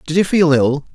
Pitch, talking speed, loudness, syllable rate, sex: 155 Hz, 255 wpm, -15 LUFS, 5.3 syllables/s, male